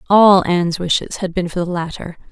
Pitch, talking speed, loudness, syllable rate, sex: 180 Hz, 205 wpm, -16 LUFS, 5.5 syllables/s, female